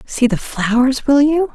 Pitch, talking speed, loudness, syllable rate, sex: 265 Hz, 195 wpm, -15 LUFS, 4.2 syllables/s, female